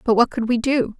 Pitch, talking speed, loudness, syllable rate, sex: 240 Hz, 300 wpm, -19 LUFS, 5.6 syllables/s, female